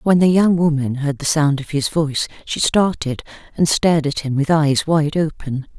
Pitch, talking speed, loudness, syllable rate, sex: 150 Hz, 210 wpm, -18 LUFS, 4.9 syllables/s, female